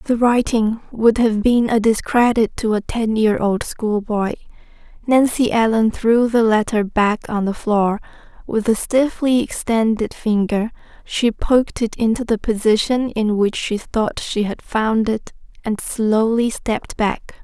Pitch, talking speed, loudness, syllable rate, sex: 225 Hz, 155 wpm, -18 LUFS, 4.0 syllables/s, female